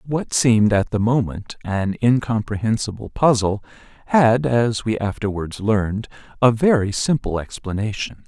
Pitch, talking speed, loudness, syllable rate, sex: 110 Hz, 125 wpm, -20 LUFS, 4.6 syllables/s, male